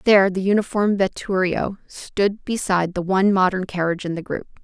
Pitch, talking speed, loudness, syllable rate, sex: 190 Hz, 170 wpm, -21 LUFS, 5.8 syllables/s, female